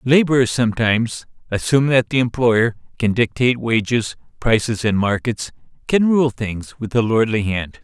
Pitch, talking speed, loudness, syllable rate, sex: 115 Hz, 145 wpm, -18 LUFS, 4.9 syllables/s, male